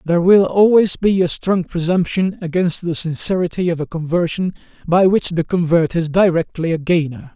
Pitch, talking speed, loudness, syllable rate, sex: 175 Hz, 170 wpm, -17 LUFS, 5.1 syllables/s, male